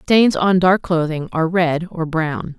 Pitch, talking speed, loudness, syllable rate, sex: 170 Hz, 185 wpm, -17 LUFS, 4.0 syllables/s, female